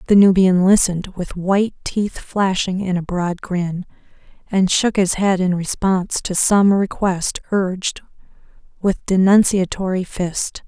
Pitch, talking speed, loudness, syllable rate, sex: 190 Hz, 135 wpm, -18 LUFS, 4.2 syllables/s, female